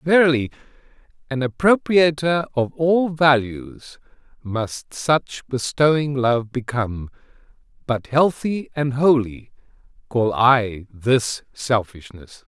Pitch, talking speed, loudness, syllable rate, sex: 130 Hz, 90 wpm, -20 LUFS, 3.5 syllables/s, male